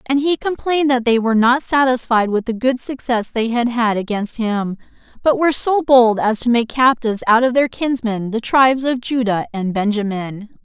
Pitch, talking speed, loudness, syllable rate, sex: 240 Hz, 195 wpm, -17 LUFS, 5.1 syllables/s, female